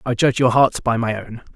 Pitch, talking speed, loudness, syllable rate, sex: 120 Hz, 270 wpm, -18 LUFS, 5.8 syllables/s, male